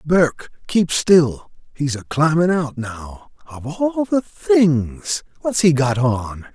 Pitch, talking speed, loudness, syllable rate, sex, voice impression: 155 Hz, 135 wpm, -18 LUFS, 3.2 syllables/s, male, masculine, middle-aged, tensed, powerful, clear, fluent, cool, mature, friendly, wild, lively, slightly strict